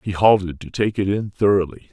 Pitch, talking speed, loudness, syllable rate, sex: 95 Hz, 220 wpm, -19 LUFS, 5.7 syllables/s, male